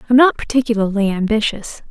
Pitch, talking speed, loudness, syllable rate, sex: 225 Hz, 125 wpm, -16 LUFS, 6.1 syllables/s, female